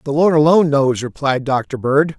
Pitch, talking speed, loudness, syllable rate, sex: 145 Hz, 190 wpm, -15 LUFS, 4.9 syllables/s, male